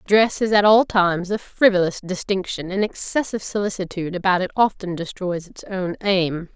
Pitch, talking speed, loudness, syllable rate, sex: 190 Hz, 165 wpm, -21 LUFS, 5.2 syllables/s, female